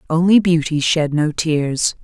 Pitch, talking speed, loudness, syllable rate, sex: 160 Hz, 145 wpm, -16 LUFS, 3.9 syllables/s, female